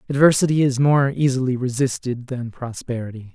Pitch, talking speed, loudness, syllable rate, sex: 130 Hz, 125 wpm, -20 LUFS, 5.5 syllables/s, male